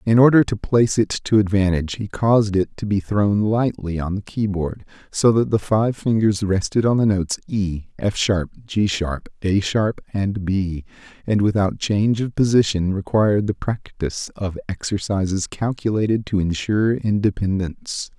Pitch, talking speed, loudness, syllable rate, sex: 100 Hz, 160 wpm, -20 LUFS, 4.8 syllables/s, male